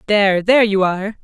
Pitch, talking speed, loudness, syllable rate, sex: 205 Hz, 195 wpm, -15 LUFS, 6.7 syllables/s, female